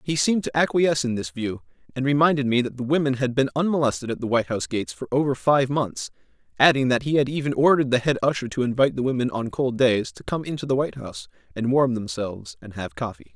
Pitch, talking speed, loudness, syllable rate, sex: 135 Hz, 240 wpm, -23 LUFS, 6.7 syllables/s, male